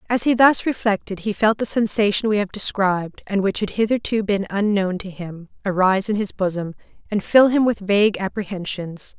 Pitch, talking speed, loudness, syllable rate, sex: 205 Hz, 190 wpm, -20 LUFS, 5.3 syllables/s, female